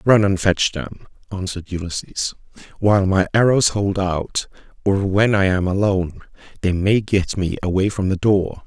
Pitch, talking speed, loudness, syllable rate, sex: 95 Hz, 165 wpm, -19 LUFS, 4.7 syllables/s, male